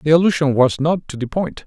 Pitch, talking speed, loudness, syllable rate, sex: 155 Hz, 250 wpm, -18 LUFS, 5.5 syllables/s, male